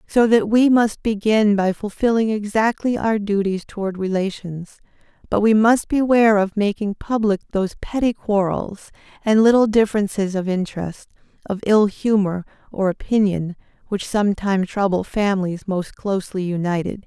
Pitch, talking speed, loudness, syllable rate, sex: 205 Hz, 135 wpm, -19 LUFS, 5.1 syllables/s, female